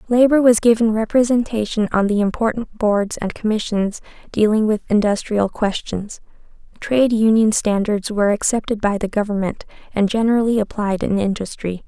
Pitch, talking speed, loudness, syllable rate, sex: 215 Hz, 135 wpm, -18 LUFS, 5.3 syllables/s, female